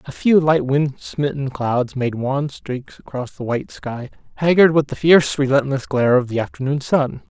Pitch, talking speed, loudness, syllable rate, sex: 135 Hz, 190 wpm, -19 LUFS, 4.8 syllables/s, male